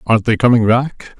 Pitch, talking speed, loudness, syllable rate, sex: 115 Hz, 200 wpm, -13 LUFS, 5.6 syllables/s, male